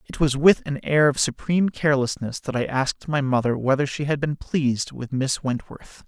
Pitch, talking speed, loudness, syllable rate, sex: 140 Hz, 205 wpm, -22 LUFS, 5.2 syllables/s, male